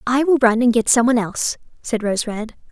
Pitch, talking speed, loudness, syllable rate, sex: 235 Hz, 220 wpm, -18 LUFS, 5.9 syllables/s, female